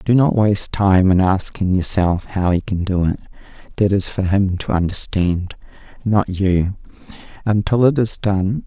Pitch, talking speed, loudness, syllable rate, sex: 100 Hz, 160 wpm, -18 LUFS, 4.3 syllables/s, male